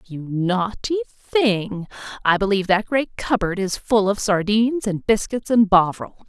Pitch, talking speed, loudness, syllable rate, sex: 205 Hz, 155 wpm, -20 LUFS, 4.3 syllables/s, female